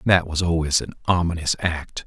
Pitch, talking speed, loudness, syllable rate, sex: 85 Hz, 175 wpm, -22 LUFS, 4.9 syllables/s, male